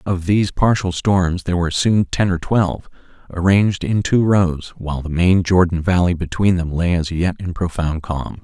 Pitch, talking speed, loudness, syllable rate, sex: 90 Hz, 190 wpm, -18 LUFS, 5.0 syllables/s, male